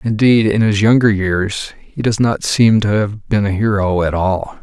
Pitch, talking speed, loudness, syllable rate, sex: 105 Hz, 210 wpm, -15 LUFS, 4.3 syllables/s, male